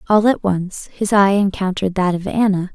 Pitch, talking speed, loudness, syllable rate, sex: 195 Hz, 195 wpm, -17 LUFS, 5.3 syllables/s, female